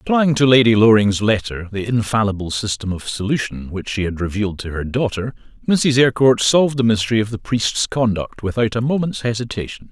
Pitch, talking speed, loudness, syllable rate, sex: 110 Hz, 180 wpm, -18 LUFS, 5.7 syllables/s, male